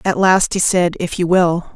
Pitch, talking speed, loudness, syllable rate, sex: 175 Hz, 240 wpm, -15 LUFS, 4.4 syllables/s, female